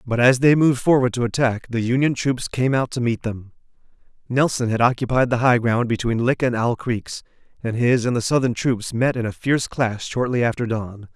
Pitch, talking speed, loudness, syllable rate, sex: 120 Hz, 215 wpm, -20 LUFS, 5.3 syllables/s, male